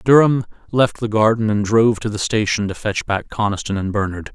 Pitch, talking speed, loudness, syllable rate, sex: 105 Hz, 205 wpm, -18 LUFS, 5.6 syllables/s, male